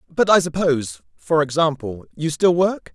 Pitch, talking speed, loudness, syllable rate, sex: 150 Hz, 165 wpm, -19 LUFS, 4.4 syllables/s, male